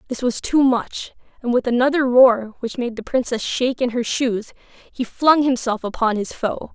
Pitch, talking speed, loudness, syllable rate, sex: 250 Hz, 195 wpm, -19 LUFS, 4.7 syllables/s, female